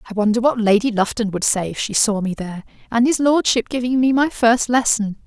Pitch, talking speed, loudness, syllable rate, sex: 225 Hz, 230 wpm, -18 LUFS, 5.7 syllables/s, female